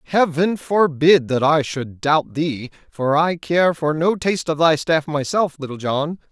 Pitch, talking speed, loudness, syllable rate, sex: 155 Hz, 180 wpm, -19 LUFS, 4.1 syllables/s, male